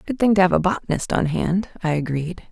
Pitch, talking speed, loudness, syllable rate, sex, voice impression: 180 Hz, 240 wpm, -21 LUFS, 5.9 syllables/s, female, feminine, slightly middle-aged, tensed, slightly powerful, slightly dark, hard, clear, slightly raspy, intellectual, calm, reassuring, elegant, slightly lively, slightly sharp